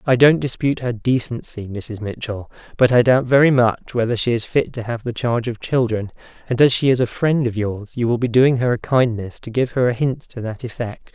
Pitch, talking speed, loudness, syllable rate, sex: 120 Hz, 240 wpm, -19 LUFS, 5.4 syllables/s, male